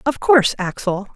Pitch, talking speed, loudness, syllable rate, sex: 220 Hz, 155 wpm, -17 LUFS, 5.3 syllables/s, female